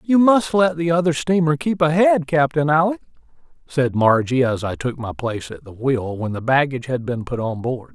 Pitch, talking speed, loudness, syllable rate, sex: 145 Hz, 210 wpm, -19 LUFS, 5.2 syllables/s, male